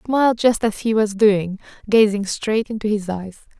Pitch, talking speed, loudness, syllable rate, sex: 210 Hz, 200 wpm, -19 LUFS, 6.6 syllables/s, female